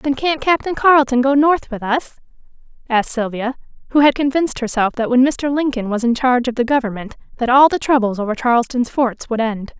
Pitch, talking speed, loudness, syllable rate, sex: 255 Hz, 200 wpm, -17 LUFS, 5.8 syllables/s, female